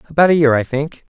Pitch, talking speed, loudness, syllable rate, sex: 145 Hz, 255 wpm, -15 LUFS, 6.8 syllables/s, male